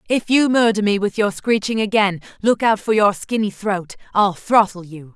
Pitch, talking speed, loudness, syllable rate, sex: 205 Hz, 185 wpm, -18 LUFS, 4.9 syllables/s, female